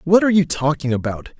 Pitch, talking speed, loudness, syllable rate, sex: 155 Hz, 215 wpm, -18 LUFS, 6.3 syllables/s, male